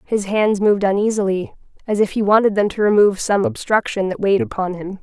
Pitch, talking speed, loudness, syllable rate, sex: 205 Hz, 205 wpm, -18 LUFS, 6.1 syllables/s, female